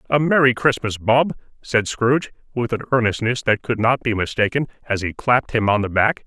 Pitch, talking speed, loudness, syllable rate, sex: 120 Hz, 200 wpm, -19 LUFS, 5.4 syllables/s, male